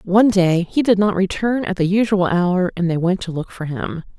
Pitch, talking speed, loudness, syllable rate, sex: 185 Hz, 245 wpm, -18 LUFS, 5.2 syllables/s, female